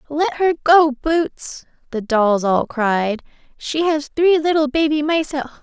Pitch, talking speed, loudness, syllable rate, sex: 285 Hz, 170 wpm, -17 LUFS, 4.0 syllables/s, female